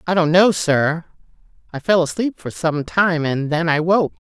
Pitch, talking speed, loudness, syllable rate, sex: 165 Hz, 195 wpm, -18 LUFS, 4.4 syllables/s, female